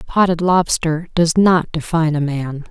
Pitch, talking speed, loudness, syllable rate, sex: 165 Hz, 155 wpm, -16 LUFS, 4.4 syllables/s, female